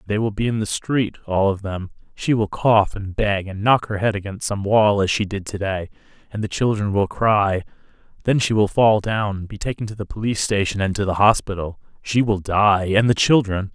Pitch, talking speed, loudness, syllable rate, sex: 105 Hz, 225 wpm, -20 LUFS, 5.1 syllables/s, male